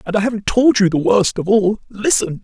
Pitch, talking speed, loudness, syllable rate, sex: 205 Hz, 245 wpm, -16 LUFS, 5.4 syllables/s, male